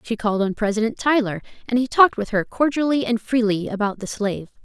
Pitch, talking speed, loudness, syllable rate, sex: 225 Hz, 205 wpm, -21 LUFS, 6.3 syllables/s, female